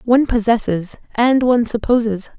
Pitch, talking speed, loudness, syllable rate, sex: 230 Hz, 125 wpm, -16 LUFS, 5.1 syllables/s, female